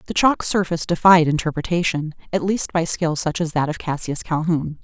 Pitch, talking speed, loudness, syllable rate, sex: 165 Hz, 175 wpm, -20 LUFS, 5.4 syllables/s, female